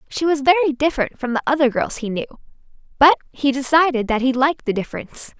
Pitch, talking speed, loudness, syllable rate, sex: 275 Hz, 200 wpm, -19 LUFS, 6.5 syllables/s, female